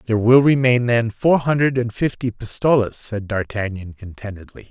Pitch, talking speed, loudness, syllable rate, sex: 115 Hz, 155 wpm, -18 LUFS, 5.1 syllables/s, male